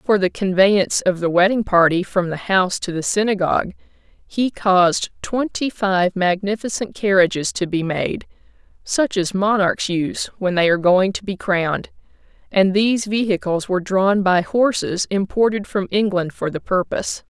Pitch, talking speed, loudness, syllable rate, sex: 190 Hz, 160 wpm, -19 LUFS, 4.8 syllables/s, female